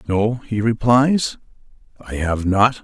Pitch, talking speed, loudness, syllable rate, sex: 110 Hz, 125 wpm, -18 LUFS, 3.5 syllables/s, male